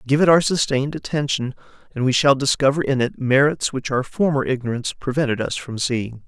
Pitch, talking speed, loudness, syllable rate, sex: 135 Hz, 190 wpm, -20 LUFS, 5.8 syllables/s, male